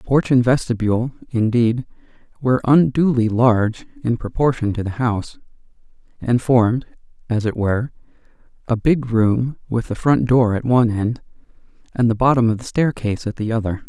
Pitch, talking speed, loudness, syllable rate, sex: 120 Hz, 155 wpm, -19 LUFS, 5.3 syllables/s, male